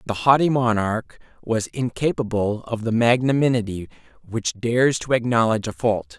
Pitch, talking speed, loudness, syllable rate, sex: 115 Hz, 145 wpm, -21 LUFS, 5.2 syllables/s, male